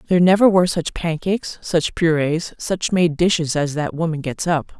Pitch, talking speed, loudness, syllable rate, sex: 165 Hz, 190 wpm, -19 LUFS, 5.1 syllables/s, female